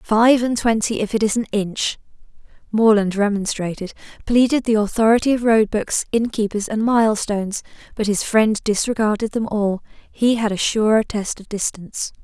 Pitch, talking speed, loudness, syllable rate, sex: 215 Hz, 155 wpm, -19 LUFS, 5.0 syllables/s, female